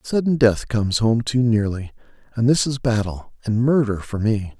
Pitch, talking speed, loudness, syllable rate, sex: 115 Hz, 185 wpm, -20 LUFS, 4.8 syllables/s, male